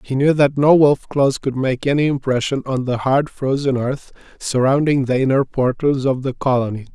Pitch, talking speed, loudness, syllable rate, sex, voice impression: 135 Hz, 190 wpm, -18 LUFS, 4.9 syllables/s, male, masculine, slightly old, relaxed, powerful, slightly muffled, halting, raspy, calm, mature, friendly, wild, strict